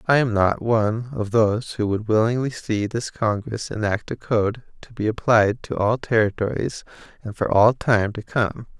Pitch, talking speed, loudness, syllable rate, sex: 110 Hz, 185 wpm, -22 LUFS, 4.7 syllables/s, male